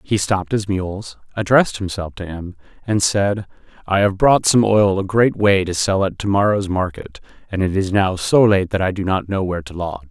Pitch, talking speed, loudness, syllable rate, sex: 95 Hz, 225 wpm, -18 LUFS, 5.2 syllables/s, male